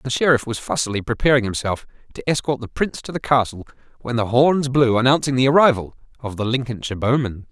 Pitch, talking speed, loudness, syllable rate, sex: 125 Hz, 190 wpm, -19 LUFS, 6.3 syllables/s, male